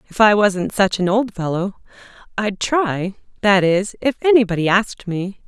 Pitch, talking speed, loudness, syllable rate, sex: 205 Hz, 165 wpm, -18 LUFS, 4.6 syllables/s, female